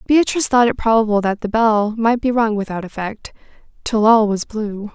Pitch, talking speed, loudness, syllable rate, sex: 220 Hz, 195 wpm, -17 LUFS, 5.2 syllables/s, female